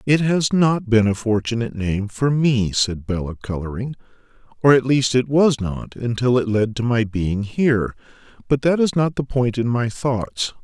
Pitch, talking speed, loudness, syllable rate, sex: 120 Hz, 180 wpm, -20 LUFS, 4.6 syllables/s, male